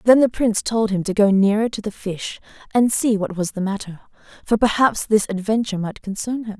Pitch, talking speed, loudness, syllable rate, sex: 210 Hz, 220 wpm, -20 LUFS, 5.6 syllables/s, female